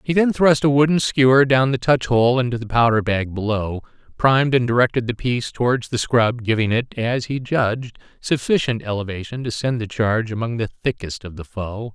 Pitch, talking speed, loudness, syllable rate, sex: 120 Hz, 200 wpm, -19 LUFS, 5.3 syllables/s, male